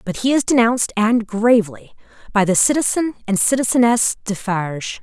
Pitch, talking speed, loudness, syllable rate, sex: 220 Hz, 120 wpm, -17 LUFS, 5.3 syllables/s, female